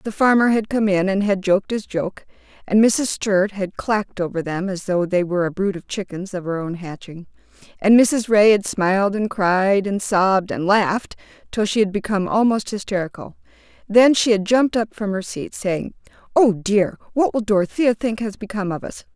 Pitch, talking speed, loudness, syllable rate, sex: 200 Hz, 205 wpm, -19 LUFS, 5.2 syllables/s, female